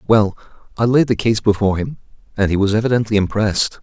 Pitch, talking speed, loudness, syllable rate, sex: 110 Hz, 190 wpm, -17 LUFS, 6.7 syllables/s, male